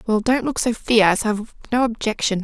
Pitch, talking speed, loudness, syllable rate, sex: 225 Hz, 200 wpm, -20 LUFS, 5.6 syllables/s, female